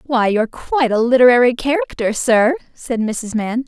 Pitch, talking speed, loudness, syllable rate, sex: 240 Hz, 165 wpm, -16 LUFS, 5.0 syllables/s, female